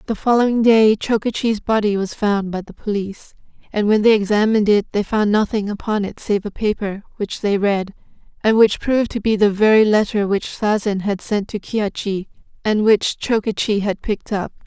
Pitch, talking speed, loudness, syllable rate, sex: 210 Hz, 190 wpm, -18 LUFS, 5.2 syllables/s, female